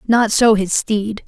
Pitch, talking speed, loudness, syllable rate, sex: 215 Hz, 190 wpm, -16 LUFS, 3.5 syllables/s, female